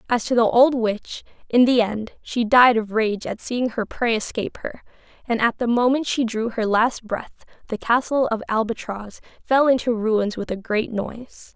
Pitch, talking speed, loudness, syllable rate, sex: 230 Hz, 195 wpm, -21 LUFS, 4.6 syllables/s, female